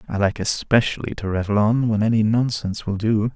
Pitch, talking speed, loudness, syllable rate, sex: 110 Hz, 195 wpm, -21 LUFS, 5.6 syllables/s, male